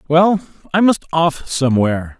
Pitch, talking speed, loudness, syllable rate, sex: 155 Hz, 135 wpm, -16 LUFS, 4.7 syllables/s, male